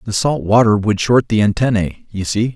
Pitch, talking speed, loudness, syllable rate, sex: 110 Hz, 210 wpm, -16 LUFS, 5.1 syllables/s, male